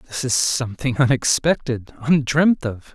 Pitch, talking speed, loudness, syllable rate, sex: 130 Hz, 120 wpm, -19 LUFS, 4.2 syllables/s, male